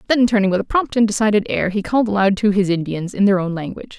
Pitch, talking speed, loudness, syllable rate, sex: 205 Hz, 270 wpm, -18 LUFS, 6.9 syllables/s, female